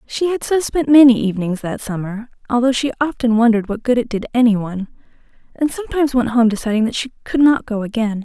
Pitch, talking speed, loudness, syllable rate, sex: 240 Hz, 210 wpm, -17 LUFS, 6.4 syllables/s, female